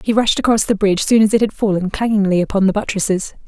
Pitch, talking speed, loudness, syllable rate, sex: 205 Hz, 240 wpm, -16 LUFS, 6.7 syllables/s, female